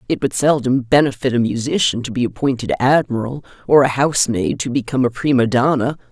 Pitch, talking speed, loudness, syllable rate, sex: 130 Hz, 175 wpm, -17 LUFS, 5.9 syllables/s, female